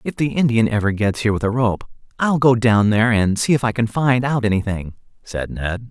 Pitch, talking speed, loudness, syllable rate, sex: 115 Hz, 235 wpm, -18 LUFS, 5.5 syllables/s, male